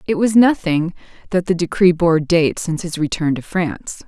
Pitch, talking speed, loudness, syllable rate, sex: 170 Hz, 190 wpm, -17 LUFS, 5.1 syllables/s, female